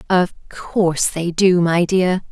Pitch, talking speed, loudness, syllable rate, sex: 180 Hz, 155 wpm, -17 LUFS, 3.6 syllables/s, female